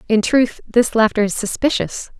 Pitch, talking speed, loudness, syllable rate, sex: 225 Hz, 165 wpm, -17 LUFS, 4.7 syllables/s, female